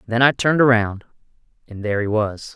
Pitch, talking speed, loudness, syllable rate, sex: 115 Hz, 190 wpm, -19 LUFS, 6.2 syllables/s, male